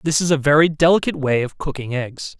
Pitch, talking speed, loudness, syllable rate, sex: 140 Hz, 225 wpm, -18 LUFS, 6.1 syllables/s, male